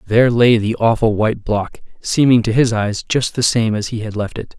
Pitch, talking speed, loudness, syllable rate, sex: 115 Hz, 235 wpm, -16 LUFS, 5.2 syllables/s, male